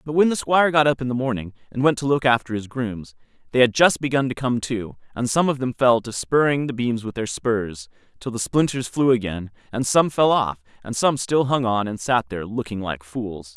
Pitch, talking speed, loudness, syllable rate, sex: 120 Hz, 245 wpm, -21 LUFS, 5.3 syllables/s, male